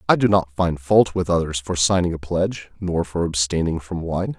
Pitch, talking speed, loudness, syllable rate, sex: 85 Hz, 220 wpm, -21 LUFS, 5.1 syllables/s, male